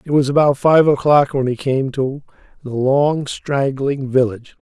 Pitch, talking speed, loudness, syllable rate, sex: 135 Hz, 170 wpm, -17 LUFS, 4.4 syllables/s, male